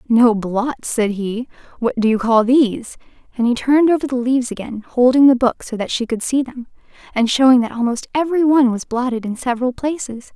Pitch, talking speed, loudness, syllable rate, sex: 245 Hz, 210 wpm, -17 LUFS, 5.8 syllables/s, female